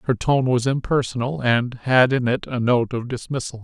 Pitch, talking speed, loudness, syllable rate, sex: 125 Hz, 200 wpm, -21 LUFS, 4.9 syllables/s, male